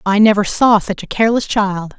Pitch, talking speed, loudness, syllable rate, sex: 205 Hz, 210 wpm, -14 LUFS, 5.4 syllables/s, female